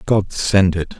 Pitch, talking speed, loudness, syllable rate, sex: 95 Hz, 180 wpm, -17 LUFS, 3.5 syllables/s, male